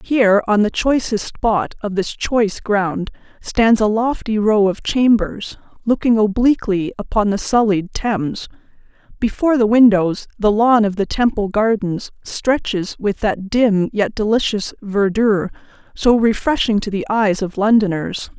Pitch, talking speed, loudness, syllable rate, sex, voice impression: 215 Hz, 145 wpm, -17 LUFS, 4.4 syllables/s, female, feminine, adult-like, powerful, slightly hard, slightly muffled, slightly raspy, intellectual, calm, friendly, reassuring, lively, kind